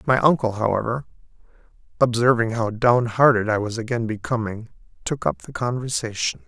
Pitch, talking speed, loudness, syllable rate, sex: 115 Hz, 130 wpm, -22 LUFS, 5.4 syllables/s, male